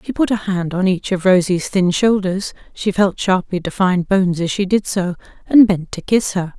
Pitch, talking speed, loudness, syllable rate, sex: 190 Hz, 200 wpm, -17 LUFS, 5.1 syllables/s, female